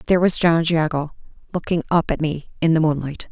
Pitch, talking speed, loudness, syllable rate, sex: 160 Hz, 200 wpm, -20 LUFS, 6.1 syllables/s, female